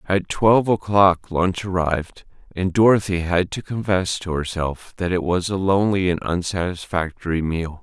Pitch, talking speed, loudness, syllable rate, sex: 90 Hz, 155 wpm, -21 LUFS, 4.8 syllables/s, male